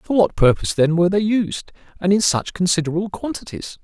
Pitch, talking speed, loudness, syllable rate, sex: 190 Hz, 190 wpm, -19 LUFS, 6.0 syllables/s, male